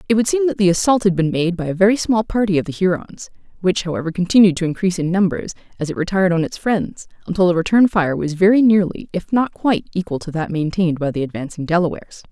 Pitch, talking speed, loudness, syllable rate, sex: 185 Hz, 235 wpm, -18 LUFS, 6.6 syllables/s, female